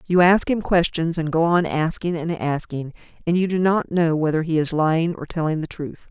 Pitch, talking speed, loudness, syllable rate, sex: 165 Hz, 225 wpm, -21 LUFS, 5.2 syllables/s, female